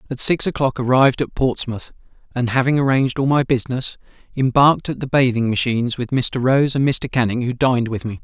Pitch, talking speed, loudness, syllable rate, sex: 125 Hz, 195 wpm, -18 LUFS, 5.9 syllables/s, male